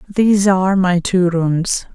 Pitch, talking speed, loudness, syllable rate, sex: 185 Hz, 155 wpm, -15 LUFS, 4.5 syllables/s, female